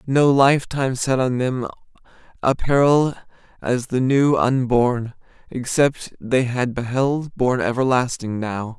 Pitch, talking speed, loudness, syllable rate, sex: 125 Hz, 115 wpm, -20 LUFS, 4.1 syllables/s, male